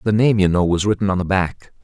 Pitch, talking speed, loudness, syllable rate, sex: 95 Hz, 295 wpm, -18 LUFS, 6.1 syllables/s, male